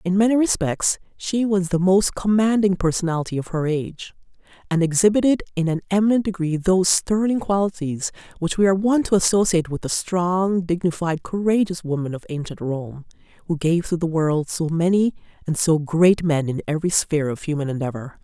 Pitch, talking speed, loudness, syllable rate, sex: 175 Hz, 175 wpm, -21 LUFS, 5.5 syllables/s, female